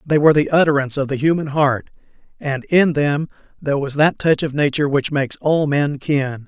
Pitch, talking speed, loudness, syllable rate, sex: 145 Hz, 205 wpm, -18 LUFS, 5.6 syllables/s, male